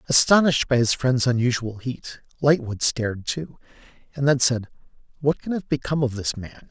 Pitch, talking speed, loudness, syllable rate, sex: 130 Hz, 170 wpm, -22 LUFS, 5.3 syllables/s, male